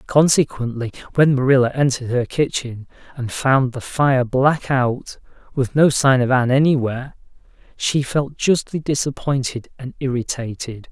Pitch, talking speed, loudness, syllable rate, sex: 130 Hz, 130 wpm, -19 LUFS, 4.7 syllables/s, male